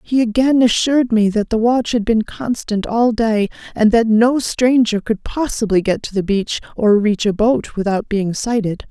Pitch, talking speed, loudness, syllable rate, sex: 225 Hz, 195 wpm, -16 LUFS, 4.5 syllables/s, female